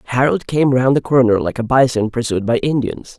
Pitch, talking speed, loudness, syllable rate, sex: 125 Hz, 205 wpm, -16 LUFS, 5.5 syllables/s, male